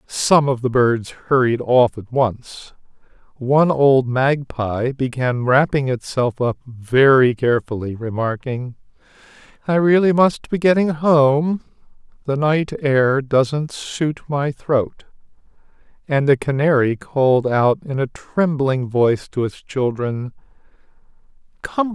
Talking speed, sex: 130 wpm, male